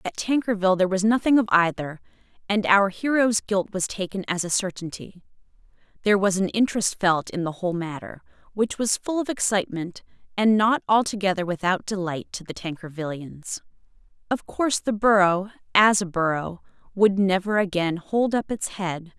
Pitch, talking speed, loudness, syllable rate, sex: 195 Hz, 165 wpm, -23 LUFS, 5.2 syllables/s, female